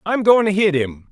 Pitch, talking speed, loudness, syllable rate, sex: 185 Hz, 270 wpm, -16 LUFS, 6.2 syllables/s, male